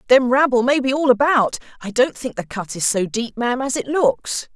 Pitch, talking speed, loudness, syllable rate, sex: 245 Hz, 235 wpm, -19 LUFS, 5.1 syllables/s, female